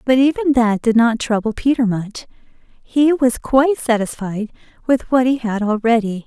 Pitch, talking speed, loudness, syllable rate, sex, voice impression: 240 Hz, 165 wpm, -17 LUFS, 4.6 syllables/s, female, feminine, adult-like, slightly intellectual, elegant, slightly sweet, slightly kind